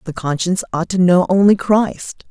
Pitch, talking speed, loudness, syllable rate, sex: 185 Hz, 180 wpm, -15 LUFS, 4.9 syllables/s, female